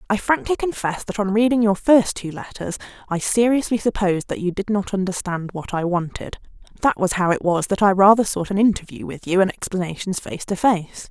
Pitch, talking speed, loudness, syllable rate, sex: 200 Hz, 210 wpm, -20 LUFS, 5.5 syllables/s, female